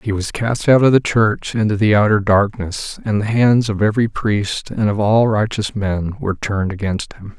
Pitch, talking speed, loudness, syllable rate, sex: 105 Hz, 210 wpm, -17 LUFS, 4.9 syllables/s, male